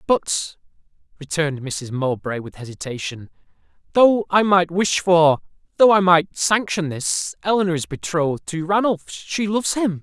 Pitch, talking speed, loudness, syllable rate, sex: 170 Hz, 130 wpm, -20 LUFS, 4.6 syllables/s, male